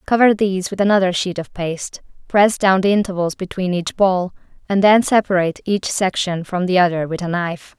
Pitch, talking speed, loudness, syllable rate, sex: 185 Hz, 195 wpm, -18 LUFS, 5.5 syllables/s, female